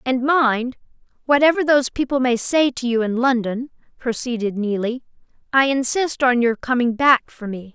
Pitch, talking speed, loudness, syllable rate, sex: 250 Hz, 165 wpm, -19 LUFS, 4.9 syllables/s, female